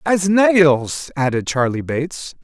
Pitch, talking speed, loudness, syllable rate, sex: 155 Hz, 125 wpm, -17 LUFS, 3.6 syllables/s, male